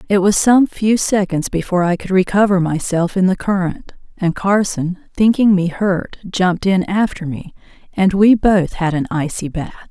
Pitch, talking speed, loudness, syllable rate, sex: 190 Hz, 175 wpm, -16 LUFS, 4.8 syllables/s, female